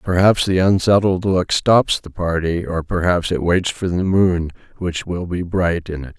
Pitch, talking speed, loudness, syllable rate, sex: 90 Hz, 225 wpm, -18 LUFS, 4.9 syllables/s, male